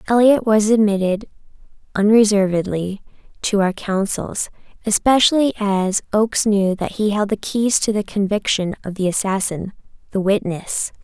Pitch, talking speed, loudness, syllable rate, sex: 205 Hz, 125 wpm, -18 LUFS, 4.7 syllables/s, female